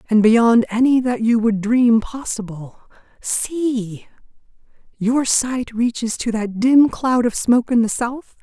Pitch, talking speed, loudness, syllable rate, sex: 235 Hz, 140 wpm, -18 LUFS, 3.8 syllables/s, female